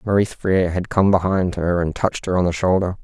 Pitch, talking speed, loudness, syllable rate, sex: 90 Hz, 240 wpm, -19 LUFS, 6.2 syllables/s, male